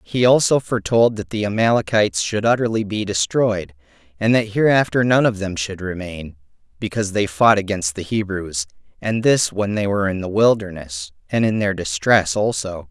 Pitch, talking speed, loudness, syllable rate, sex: 100 Hz, 170 wpm, -19 LUFS, 5.2 syllables/s, male